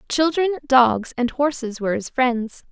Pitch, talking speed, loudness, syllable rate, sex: 260 Hz, 155 wpm, -20 LUFS, 4.3 syllables/s, female